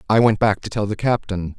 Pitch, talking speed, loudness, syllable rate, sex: 105 Hz, 265 wpm, -20 LUFS, 5.7 syllables/s, male